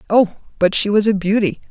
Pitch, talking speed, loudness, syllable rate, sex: 200 Hz, 210 wpm, -17 LUFS, 5.7 syllables/s, female